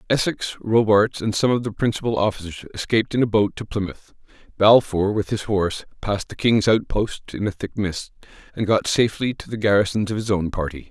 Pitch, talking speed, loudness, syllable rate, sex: 105 Hz, 200 wpm, -21 LUFS, 5.6 syllables/s, male